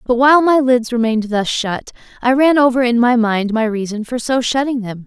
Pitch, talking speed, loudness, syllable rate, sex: 240 Hz, 225 wpm, -15 LUFS, 5.4 syllables/s, female